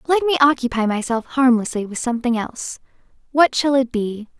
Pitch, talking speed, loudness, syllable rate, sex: 250 Hz, 165 wpm, -19 LUFS, 5.5 syllables/s, female